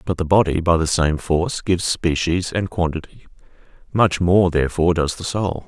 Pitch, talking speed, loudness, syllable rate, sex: 85 Hz, 180 wpm, -19 LUFS, 5.3 syllables/s, male